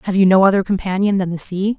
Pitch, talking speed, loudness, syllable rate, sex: 190 Hz, 270 wpm, -16 LUFS, 6.7 syllables/s, female